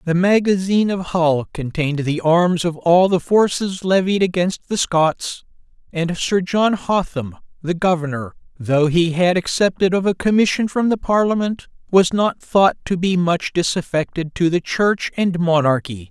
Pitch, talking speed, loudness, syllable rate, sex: 175 Hz, 160 wpm, -18 LUFS, 4.5 syllables/s, male